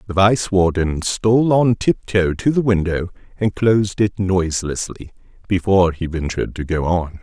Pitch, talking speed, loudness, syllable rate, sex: 95 Hz, 165 wpm, -18 LUFS, 4.9 syllables/s, male